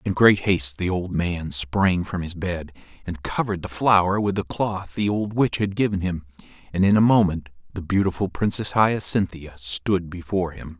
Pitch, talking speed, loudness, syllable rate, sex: 90 Hz, 190 wpm, -22 LUFS, 4.9 syllables/s, male